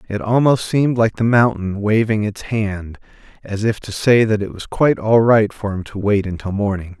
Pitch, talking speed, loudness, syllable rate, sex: 105 Hz, 215 wpm, -17 LUFS, 5.0 syllables/s, male